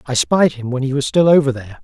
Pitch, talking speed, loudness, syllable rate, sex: 135 Hz, 295 wpm, -16 LUFS, 6.4 syllables/s, male